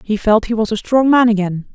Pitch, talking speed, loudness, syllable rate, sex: 220 Hz, 275 wpm, -15 LUFS, 5.6 syllables/s, female